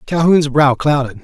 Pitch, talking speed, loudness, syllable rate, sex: 145 Hz, 145 wpm, -13 LUFS, 4.5 syllables/s, male